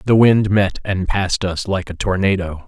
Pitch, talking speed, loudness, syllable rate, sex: 95 Hz, 200 wpm, -18 LUFS, 4.9 syllables/s, male